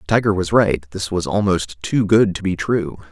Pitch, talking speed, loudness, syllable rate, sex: 95 Hz, 210 wpm, -18 LUFS, 4.7 syllables/s, male